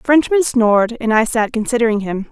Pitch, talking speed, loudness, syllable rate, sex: 235 Hz, 205 wpm, -15 LUFS, 5.8 syllables/s, female